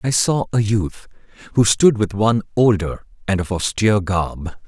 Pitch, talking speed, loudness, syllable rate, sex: 105 Hz, 165 wpm, -18 LUFS, 4.7 syllables/s, male